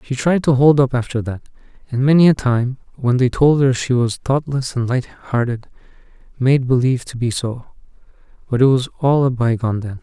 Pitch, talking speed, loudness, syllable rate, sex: 130 Hz, 190 wpm, -17 LUFS, 5.3 syllables/s, male